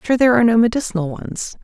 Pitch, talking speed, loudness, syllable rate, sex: 220 Hz, 220 wpm, -17 LUFS, 7.3 syllables/s, female